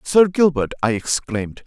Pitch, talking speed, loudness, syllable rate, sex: 140 Hz, 145 wpm, -19 LUFS, 4.7 syllables/s, male